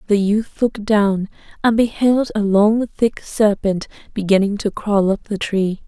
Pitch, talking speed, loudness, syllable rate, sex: 210 Hz, 165 wpm, -18 LUFS, 4.2 syllables/s, female